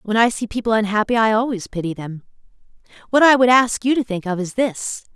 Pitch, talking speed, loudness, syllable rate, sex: 220 Hz, 220 wpm, -18 LUFS, 5.8 syllables/s, female